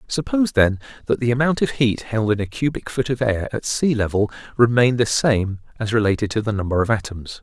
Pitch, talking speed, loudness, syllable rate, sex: 115 Hz, 210 wpm, -20 LUFS, 5.8 syllables/s, male